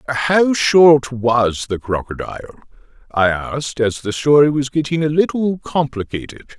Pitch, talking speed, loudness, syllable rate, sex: 135 Hz, 135 wpm, -16 LUFS, 4.8 syllables/s, male